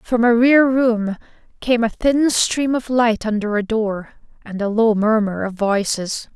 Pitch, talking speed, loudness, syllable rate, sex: 225 Hz, 180 wpm, -18 LUFS, 3.9 syllables/s, female